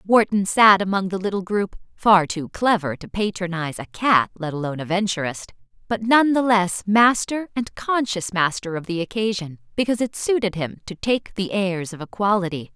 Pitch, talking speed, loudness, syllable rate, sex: 195 Hz, 180 wpm, -21 LUFS, 5.1 syllables/s, female